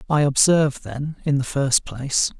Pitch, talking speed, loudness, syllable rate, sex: 140 Hz, 175 wpm, -20 LUFS, 4.8 syllables/s, male